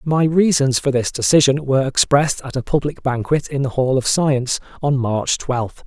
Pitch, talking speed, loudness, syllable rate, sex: 135 Hz, 195 wpm, -18 LUFS, 5.1 syllables/s, male